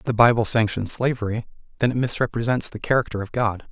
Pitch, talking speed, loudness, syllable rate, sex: 115 Hz, 195 wpm, -22 LUFS, 6.4 syllables/s, male